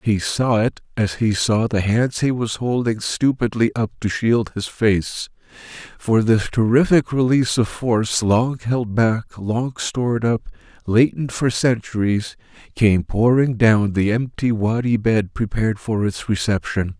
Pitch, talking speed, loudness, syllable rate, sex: 115 Hz, 150 wpm, -19 LUFS, 4.1 syllables/s, male